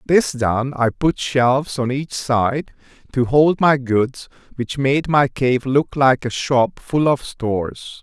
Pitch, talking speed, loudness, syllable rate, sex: 130 Hz, 170 wpm, -18 LUFS, 3.4 syllables/s, male